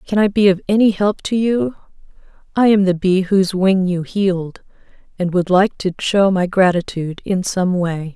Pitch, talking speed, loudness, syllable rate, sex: 190 Hz, 190 wpm, -17 LUFS, 4.9 syllables/s, female